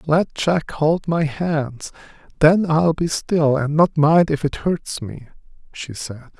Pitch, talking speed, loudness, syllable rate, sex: 155 Hz, 170 wpm, -19 LUFS, 3.5 syllables/s, male